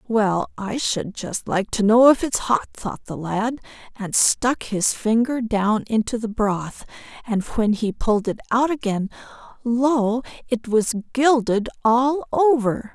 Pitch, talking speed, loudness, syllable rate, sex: 230 Hz, 160 wpm, -21 LUFS, 3.7 syllables/s, female